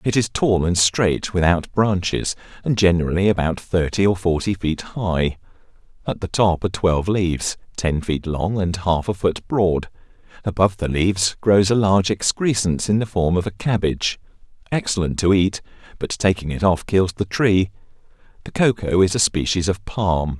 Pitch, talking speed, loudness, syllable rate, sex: 95 Hz, 175 wpm, -20 LUFS, 5.0 syllables/s, male